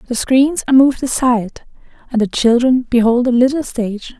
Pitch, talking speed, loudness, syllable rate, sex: 245 Hz, 170 wpm, -14 LUFS, 5.7 syllables/s, female